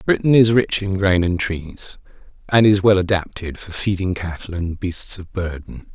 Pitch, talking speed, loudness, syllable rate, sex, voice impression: 95 Hz, 180 wpm, -19 LUFS, 4.5 syllables/s, male, very masculine, very thick, slightly tensed, very powerful, slightly bright, very soft, very muffled, slightly halting, very raspy, very cool, intellectual, slightly refreshing, sincere, calm, very mature, friendly, very reassuring, very unique, elegant, very wild, sweet, lively, very kind, slightly modest